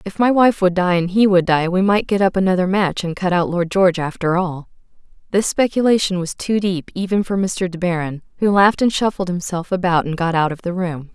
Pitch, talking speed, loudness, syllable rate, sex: 185 Hz, 235 wpm, -18 LUFS, 5.6 syllables/s, female